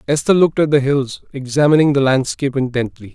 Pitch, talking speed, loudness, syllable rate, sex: 140 Hz, 170 wpm, -16 LUFS, 6.2 syllables/s, male